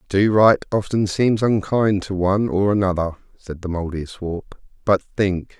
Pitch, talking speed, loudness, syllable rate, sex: 95 Hz, 160 wpm, -20 LUFS, 4.9 syllables/s, male